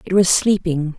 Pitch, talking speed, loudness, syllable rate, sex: 180 Hz, 185 wpm, -17 LUFS, 4.6 syllables/s, female